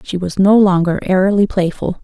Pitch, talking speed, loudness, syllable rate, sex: 190 Hz, 175 wpm, -14 LUFS, 5.3 syllables/s, female